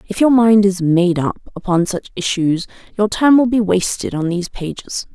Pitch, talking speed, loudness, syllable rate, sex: 195 Hz, 200 wpm, -16 LUFS, 4.8 syllables/s, female